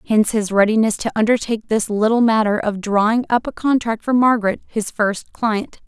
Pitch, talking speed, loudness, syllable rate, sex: 220 Hz, 185 wpm, -18 LUFS, 5.6 syllables/s, female